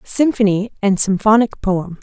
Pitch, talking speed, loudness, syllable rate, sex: 210 Hz, 120 wpm, -16 LUFS, 4.4 syllables/s, female